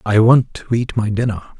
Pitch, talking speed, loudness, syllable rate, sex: 110 Hz, 225 wpm, -16 LUFS, 5.2 syllables/s, male